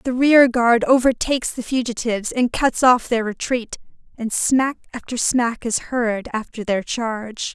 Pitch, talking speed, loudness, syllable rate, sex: 240 Hz, 160 wpm, -19 LUFS, 4.4 syllables/s, female